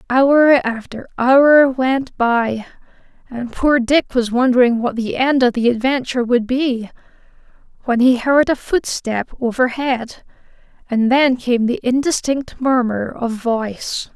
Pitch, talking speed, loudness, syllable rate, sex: 250 Hz, 135 wpm, -16 LUFS, 4.0 syllables/s, female